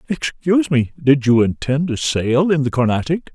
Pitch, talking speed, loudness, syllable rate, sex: 140 Hz, 180 wpm, -17 LUFS, 4.8 syllables/s, male